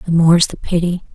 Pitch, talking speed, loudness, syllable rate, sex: 170 Hz, 210 wpm, -15 LUFS, 6.5 syllables/s, female